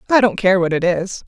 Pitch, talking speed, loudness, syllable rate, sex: 195 Hz, 285 wpm, -16 LUFS, 5.8 syllables/s, female